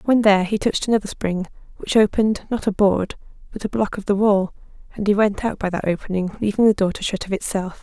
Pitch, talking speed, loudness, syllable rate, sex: 200 Hz, 240 wpm, -20 LUFS, 6.2 syllables/s, female